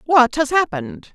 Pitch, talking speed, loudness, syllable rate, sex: 245 Hz, 155 wpm, -17 LUFS, 4.9 syllables/s, female